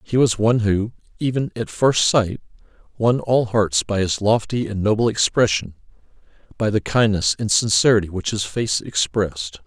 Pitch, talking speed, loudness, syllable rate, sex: 105 Hz, 160 wpm, -19 LUFS, 4.9 syllables/s, male